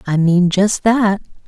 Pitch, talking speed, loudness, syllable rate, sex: 195 Hz, 165 wpm, -15 LUFS, 3.6 syllables/s, female